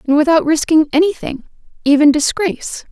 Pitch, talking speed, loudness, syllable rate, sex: 305 Hz, 105 wpm, -14 LUFS, 5.5 syllables/s, female